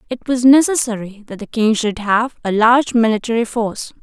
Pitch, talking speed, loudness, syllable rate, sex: 230 Hz, 180 wpm, -16 LUFS, 5.6 syllables/s, female